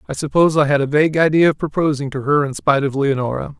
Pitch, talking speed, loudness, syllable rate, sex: 145 Hz, 250 wpm, -17 LUFS, 6.9 syllables/s, male